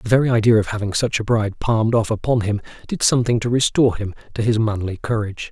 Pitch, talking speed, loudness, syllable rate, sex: 110 Hz, 230 wpm, -19 LUFS, 6.8 syllables/s, male